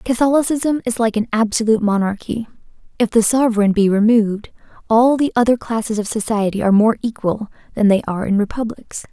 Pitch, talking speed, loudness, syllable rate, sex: 225 Hz, 165 wpm, -17 LUFS, 5.9 syllables/s, female